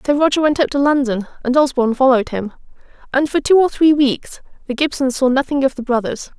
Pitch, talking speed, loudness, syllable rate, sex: 270 Hz, 215 wpm, -16 LUFS, 6.1 syllables/s, female